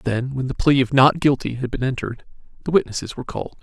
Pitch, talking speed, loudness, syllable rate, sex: 130 Hz, 230 wpm, -20 LUFS, 6.7 syllables/s, male